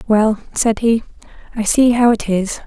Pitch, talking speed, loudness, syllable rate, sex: 220 Hz, 180 wpm, -16 LUFS, 4.4 syllables/s, female